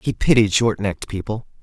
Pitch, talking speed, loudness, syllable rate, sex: 105 Hz, 185 wpm, -19 LUFS, 5.7 syllables/s, male